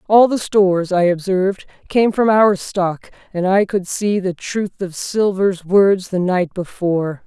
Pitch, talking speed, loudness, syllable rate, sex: 190 Hz, 175 wpm, -17 LUFS, 4.0 syllables/s, female